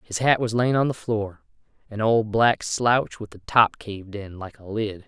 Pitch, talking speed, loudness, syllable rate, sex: 110 Hz, 225 wpm, -22 LUFS, 4.5 syllables/s, male